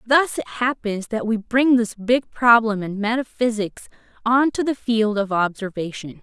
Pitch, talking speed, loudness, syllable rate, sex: 225 Hz, 165 wpm, -20 LUFS, 4.3 syllables/s, female